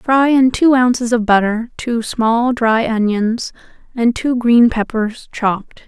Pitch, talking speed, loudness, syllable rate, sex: 235 Hz, 155 wpm, -15 LUFS, 3.7 syllables/s, female